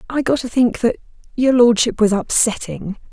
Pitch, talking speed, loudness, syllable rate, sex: 235 Hz, 175 wpm, -16 LUFS, 4.8 syllables/s, female